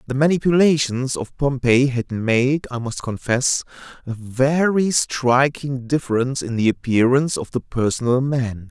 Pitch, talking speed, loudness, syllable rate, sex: 130 Hz, 140 wpm, -19 LUFS, 4.5 syllables/s, male